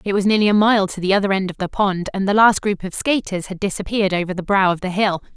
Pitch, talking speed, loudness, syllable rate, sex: 195 Hz, 290 wpm, -18 LUFS, 6.5 syllables/s, female